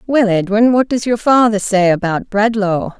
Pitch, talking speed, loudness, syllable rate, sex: 215 Hz, 180 wpm, -14 LUFS, 4.6 syllables/s, female